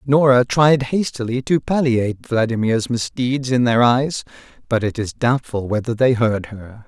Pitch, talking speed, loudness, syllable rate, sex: 125 Hz, 155 wpm, -18 LUFS, 4.4 syllables/s, male